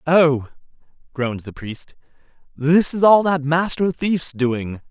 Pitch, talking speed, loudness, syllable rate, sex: 150 Hz, 135 wpm, -19 LUFS, 3.7 syllables/s, male